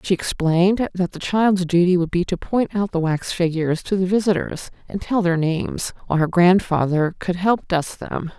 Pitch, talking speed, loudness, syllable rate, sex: 180 Hz, 200 wpm, -20 LUFS, 5.0 syllables/s, female